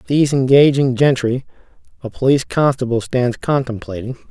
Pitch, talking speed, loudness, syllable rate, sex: 130 Hz, 110 wpm, -16 LUFS, 5.5 syllables/s, male